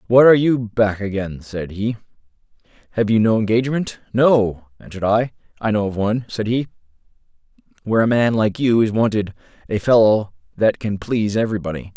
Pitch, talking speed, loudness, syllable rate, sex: 110 Hz, 160 wpm, -19 LUFS, 5.7 syllables/s, male